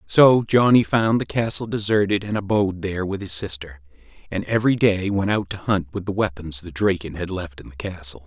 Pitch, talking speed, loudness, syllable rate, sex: 95 Hz, 210 wpm, -21 LUFS, 5.5 syllables/s, male